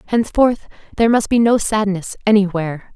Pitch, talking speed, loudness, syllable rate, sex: 210 Hz, 140 wpm, -16 LUFS, 5.9 syllables/s, female